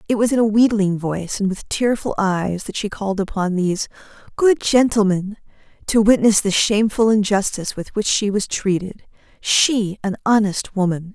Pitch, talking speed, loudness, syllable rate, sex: 205 Hz, 160 wpm, -18 LUFS, 5.1 syllables/s, female